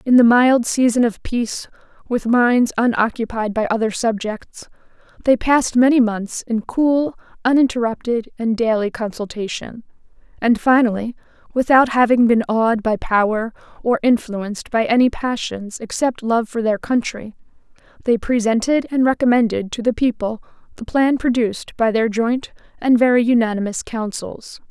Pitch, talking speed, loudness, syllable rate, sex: 235 Hz, 140 wpm, -18 LUFS, 4.8 syllables/s, female